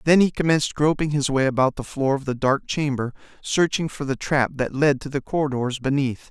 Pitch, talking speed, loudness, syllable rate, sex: 140 Hz, 220 wpm, -22 LUFS, 5.5 syllables/s, male